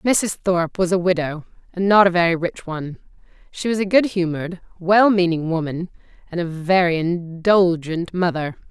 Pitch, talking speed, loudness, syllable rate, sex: 175 Hz, 165 wpm, -19 LUFS, 5.0 syllables/s, female